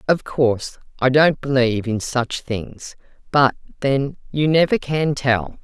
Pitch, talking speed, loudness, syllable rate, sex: 130 Hz, 150 wpm, -19 LUFS, 4.0 syllables/s, female